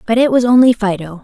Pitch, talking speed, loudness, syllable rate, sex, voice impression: 225 Hz, 245 wpm, -12 LUFS, 6.4 syllables/s, female, very feminine, slightly adult-like, slightly cute, slightly refreshing